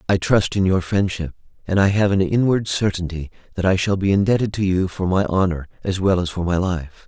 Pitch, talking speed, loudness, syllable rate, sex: 95 Hz, 230 wpm, -20 LUFS, 5.7 syllables/s, male